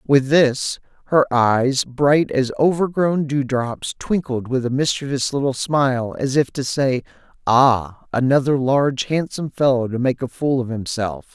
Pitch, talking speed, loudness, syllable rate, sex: 135 Hz, 160 wpm, -19 LUFS, 4.3 syllables/s, male